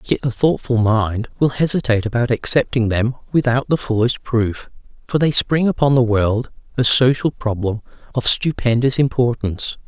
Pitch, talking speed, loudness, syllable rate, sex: 120 Hz, 150 wpm, -18 LUFS, 4.9 syllables/s, male